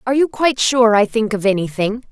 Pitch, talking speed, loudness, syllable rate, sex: 225 Hz, 225 wpm, -16 LUFS, 6.1 syllables/s, female